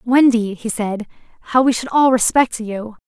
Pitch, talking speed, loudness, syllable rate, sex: 235 Hz, 175 wpm, -17 LUFS, 4.6 syllables/s, female